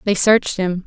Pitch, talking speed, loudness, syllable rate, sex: 195 Hz, 210 wpm, -16 LUFS, 5.3 syllables/s, female